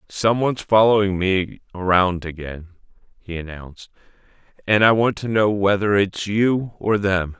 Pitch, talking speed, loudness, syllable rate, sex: 100 Hz, 140 wpm, -19 LUFS, 4.5 syllables/s, male